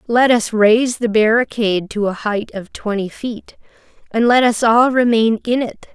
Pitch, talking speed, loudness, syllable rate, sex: 225 Hz, 180 wpm, -16 LUFS, 4.7 syllables/s, female